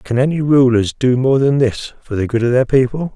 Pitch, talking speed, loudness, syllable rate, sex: 130 Hz, 245 wpm, -15 LUFS, 5.3 syllables/s, male